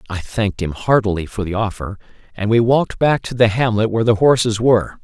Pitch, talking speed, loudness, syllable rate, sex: 110 Hz, 215 wpm, -17 LUFS, 6.0 syllables/s, male